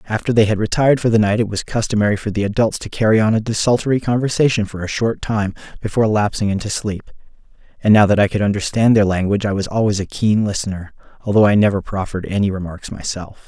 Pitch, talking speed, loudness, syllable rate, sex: 105 Hz, 215 wpm, -17 LUFS, 6.6 syllables/s, male